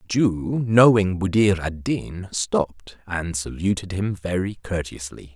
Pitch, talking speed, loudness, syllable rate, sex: 95 Hz, 135 wpm, -22 LUFS, 3.9 syllables/s, male